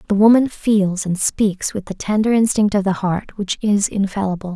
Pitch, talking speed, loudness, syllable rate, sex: 200 Hz, 200 wpm, -18 LUFS, 4.9 syllables/s, female